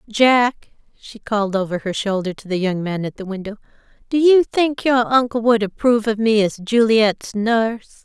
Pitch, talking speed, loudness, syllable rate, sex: 220 Hz, 185 wpm, -18 LUFS, 4.9 syllables/s, female